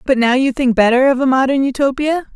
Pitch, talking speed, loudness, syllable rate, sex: 265 Hz, 230 wpm, -14 LUFS, 6.0 syllables/s, female